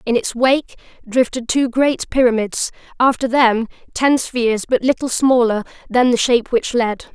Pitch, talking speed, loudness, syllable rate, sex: 245 Hz, 160 wpm, -17 LUFS, 4.6 syllables/s, female